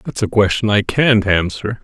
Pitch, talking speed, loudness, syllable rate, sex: 105 Hz, 195 wpm, -15 LUFS, 4.7 syllables/s, male